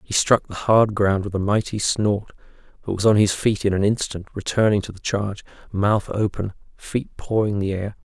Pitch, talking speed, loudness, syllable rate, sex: 100 Hz, 200 wpm, -21 LUFS, 5.0 syllables/s, male